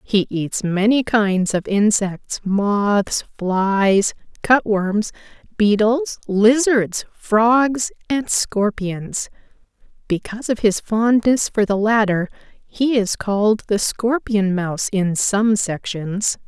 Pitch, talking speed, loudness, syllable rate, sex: 210 Hz, 110 wpm, -18 LUFS, 3.2 syllables/s, female